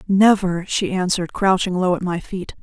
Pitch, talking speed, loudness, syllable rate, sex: 185 Hz, 185 wpm, -19 LUFS, 5.0 syllables/s, female